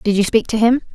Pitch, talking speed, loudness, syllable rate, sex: 225 Hz, 315 wpm, -16 LUFS, 6.3 syllables/s, female